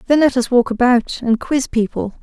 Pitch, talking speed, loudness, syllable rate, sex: 245 Hz, 215 wpm, -16 LUFS, 5.0 syllables/s, female